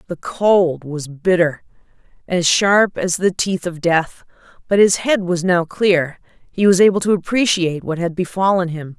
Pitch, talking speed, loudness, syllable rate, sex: 180 Hz, 175 wpm, -17 LUFS, 4.4 syllables/s, female